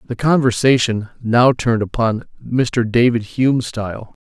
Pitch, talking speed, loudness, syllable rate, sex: 120 Hz, 125 wpm, -17 LUFS, 4.6 syllables/s, male